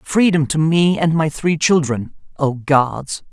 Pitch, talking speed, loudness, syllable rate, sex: 155 Hz, 145 wpm, -17 LUFS, 3.7 syllables/s, male